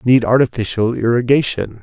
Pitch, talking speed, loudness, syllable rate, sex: 120 Hz, 100 wpm, -16 LUFS, 5.2 syllables/s, male